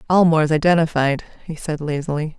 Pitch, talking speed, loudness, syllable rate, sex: 155 Hz, 125 wpm, -19 LUFS, 6.1 syllables/s, female